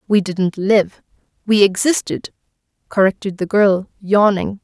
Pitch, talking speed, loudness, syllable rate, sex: 195 Hz, 105 wpm, -17 LUFS, 4.2 syllables/s, female